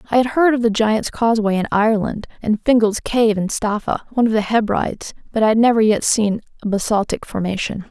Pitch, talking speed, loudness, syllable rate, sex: 220 Hz, 205 wpm, -18 LUFS, 5.8 syllables/s, female